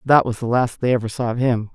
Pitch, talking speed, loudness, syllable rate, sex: 120 Hz, 310 wpm, -20 LUFS, 6.1 syllables/s, female